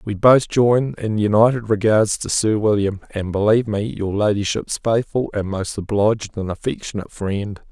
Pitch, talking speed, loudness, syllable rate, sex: 105 Hz, 165 wpm, -19 LUFS, 4.9 syllables/s, male